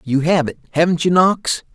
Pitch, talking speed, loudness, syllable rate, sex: 165 Hz, 205 wpm, -17 LUFS, 4.9 syllables/s, male